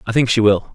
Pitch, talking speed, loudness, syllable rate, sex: 115 Hz, 320 wpm, -15 LUFS, 6.9 syllables/s, male